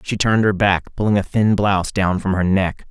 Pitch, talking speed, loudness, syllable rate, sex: 100 Hz, 250 wpm, -18 LUFS, 5.4 syllables/s, male